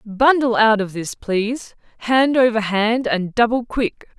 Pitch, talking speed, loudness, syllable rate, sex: 225 Hz, 160 wpm, -18 LUFS, 4.1 syllables/s, female